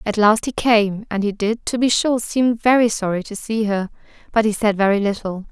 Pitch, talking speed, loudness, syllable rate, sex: 215 Hz, 230 wpm, -19 LUFS, 5.1 syllables/s, female